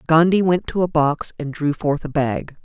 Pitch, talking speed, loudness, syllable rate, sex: 155 Hz, 225 wpm, -19 LUFS, 4.6 syllables/s, female